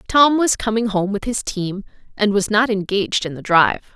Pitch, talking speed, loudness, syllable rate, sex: 210 Hz, 210 wpm, -18 LUFS, 5.2 syllables/s, female